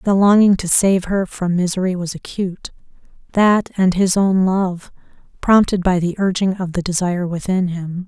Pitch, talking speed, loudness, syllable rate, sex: 185 Hz, 170 wpm, -17 LUFS, 4.9 syllables/s, female